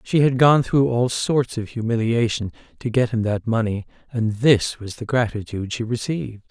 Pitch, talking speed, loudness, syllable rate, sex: 115 Hz, 185 wpm, -21 LUFS, 5.0 syllables/s, male